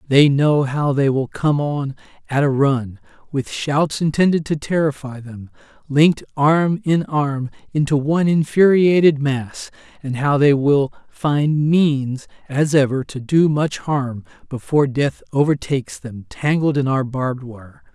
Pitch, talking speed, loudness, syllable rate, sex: 140 Hz, 150 wpm, -18 LUFS, 4.2 syllables/s, male